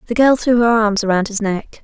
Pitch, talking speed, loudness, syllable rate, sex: 220 Hz, 260 wpm, -15 LUFS, 4.9 syllables/s, female